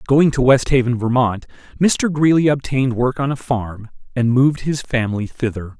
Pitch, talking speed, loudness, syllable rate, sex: 130 Hz, 165 wpm, -17 LUFS, 5.1 syllables/s, male